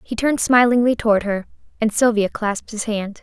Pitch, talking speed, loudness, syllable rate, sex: 225 Hz, 185 wpm, -19 LUFS, 5.7 syllables/s, female